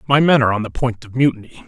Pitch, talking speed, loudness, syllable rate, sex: 125 Hz, 285 wpm, -17 LUFS, 8.1 syllables/s, male